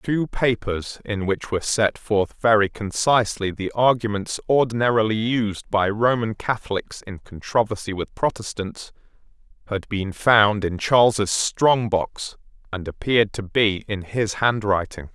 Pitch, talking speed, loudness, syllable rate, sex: 105 Hz, 135 wpm, -21 LUFS, 4.2 syllables/s, male